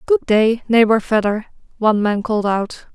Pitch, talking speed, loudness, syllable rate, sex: 220 Hz, 165 wpm, -17 LUFS, 5.1 syllables/s, female